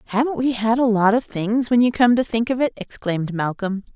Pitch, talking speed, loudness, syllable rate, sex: 225 Hz, 245 wpm, -20 LUFS, 5.5 syllables/s, female